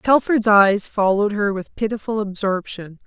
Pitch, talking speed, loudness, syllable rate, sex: 205 Hz, 135 wpm, -19 LUFS, 4.7 syllables/s, female